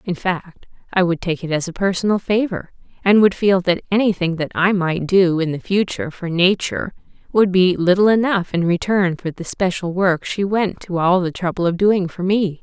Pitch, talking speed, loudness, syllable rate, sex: 185 Hz, 210 wpm, -18 LUFS, 5.0 syllables/s, female